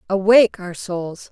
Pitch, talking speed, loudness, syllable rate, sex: 195 Hz, 135 wpm, -17 LUFS, 4.4 syllables/s, female